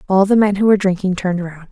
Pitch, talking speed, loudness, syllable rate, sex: 190 Hz, 280 wpm, -16 LUFS, 7.2 syllables/s, female